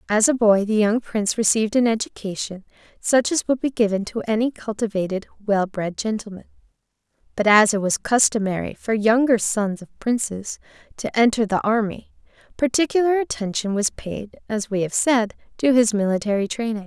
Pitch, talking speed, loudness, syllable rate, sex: 220 Hz, 165 wpm, -21 LUFS, 5.3 syllables/s, female